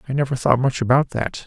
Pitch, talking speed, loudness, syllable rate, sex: 130 Hz, 245 wpm, -20 LUFS, 6.2 syllables/s, male